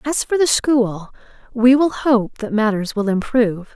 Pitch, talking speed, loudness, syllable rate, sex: 235 Hz, 175 wpm, -17 LUFS, 4.3 syllables/s, female